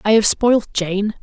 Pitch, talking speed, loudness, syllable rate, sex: 210 Hz, 195 wpm, -16 LUFS, 5.1 syllables/s, female